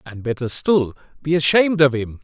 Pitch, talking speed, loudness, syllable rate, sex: 145 Hz, 190 wpm, -18 LUFS, 5.4 syllables/s, male